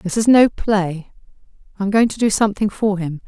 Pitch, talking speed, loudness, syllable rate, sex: 205 Hz, 220 wpm, -17 LUFS, 5.5 syllables/s, female